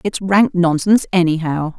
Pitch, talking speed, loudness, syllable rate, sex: 175 Hz, 135 wpm, -15 LUFS, 4.9 syllables/s, female